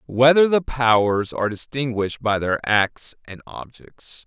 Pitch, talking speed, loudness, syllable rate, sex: 120 Hz, 140 wpm, -20 LUFS, 4.3 syllables/s, male